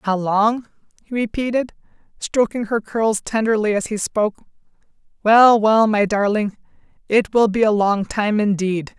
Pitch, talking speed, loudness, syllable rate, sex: 215 Hz, 145 wpm, -18 LUFS, 4.4 syllables/s, female